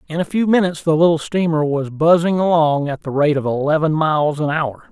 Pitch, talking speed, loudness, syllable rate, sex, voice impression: 155 Hz, 220 wpm, -17 LUFS, 5.7 syllables/s, male, very masculine, very adult-like, very middle-aged, very thick, tensed, powerful, dark, slightly soft, slightly muffled, slightly fluent, cool, intellectual, sincere, very calm, mature, friendly, reassuring, slightly unique, elegant, wild, slightly sweet, slightly lively, kind, slightly modest